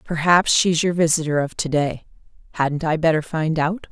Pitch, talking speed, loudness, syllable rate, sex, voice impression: 160 Hz, 185 wpm, -19 LUFS, 4.9 syllables/s, female, gender-neutral, adult-like, relaxed, slightly weak, slightly soft, fluent, sincere, calm, slightly friendly, reassuring, elegant, kind